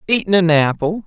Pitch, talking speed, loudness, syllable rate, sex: 175 Hz, 170 wpm, -15 LUFS, 4.4 syllables/s, male